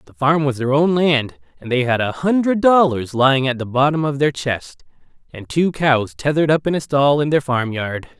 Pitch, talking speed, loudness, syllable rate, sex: 145 Hz, 225 wpm, -17 LUFS, 5.0 syllables/s, male